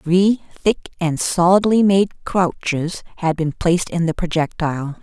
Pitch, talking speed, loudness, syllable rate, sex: 175 Hz, 145 wpm, -18 LUFS, 4.3 syllables/s, female